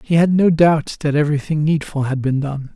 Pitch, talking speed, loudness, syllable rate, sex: 150 Hz, 220 wpm, -17 LUFS, 5.5 syllables/s, male